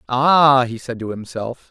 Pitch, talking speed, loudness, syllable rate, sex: 125 Hz, 175 wpm, -17 LUFS, 3.9 syllables/s, male